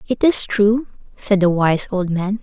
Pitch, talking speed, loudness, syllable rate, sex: 200 Hz, 200 wpm, -17 LUFS, 4.1 syllables/s, female